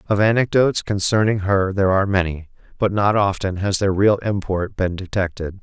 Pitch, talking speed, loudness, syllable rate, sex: 100 Hz, 170 wpm, -19 LUFS, 5.4 syllables/s, male